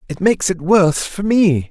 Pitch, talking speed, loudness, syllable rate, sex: 180 Hz, 210 wpm, -15 LUFS, 5.2 syllables/s, male